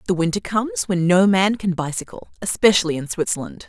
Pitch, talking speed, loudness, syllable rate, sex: 190 Hz, 180 wpm, -20 LUFS, 6.3 syllables/s, female